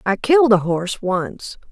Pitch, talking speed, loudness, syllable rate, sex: 215 Hz, 175 wpm, -17 LUFS, 4.7 syllables/s, female